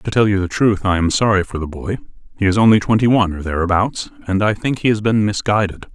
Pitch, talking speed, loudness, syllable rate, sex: 100 Hz, 240 wpm, -17 LUFS, 6.2 syllables/s, male